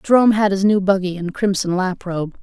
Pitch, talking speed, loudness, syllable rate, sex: 190 Hz, 225 wpm, -18 LUFS, 5.7 syllables/s, female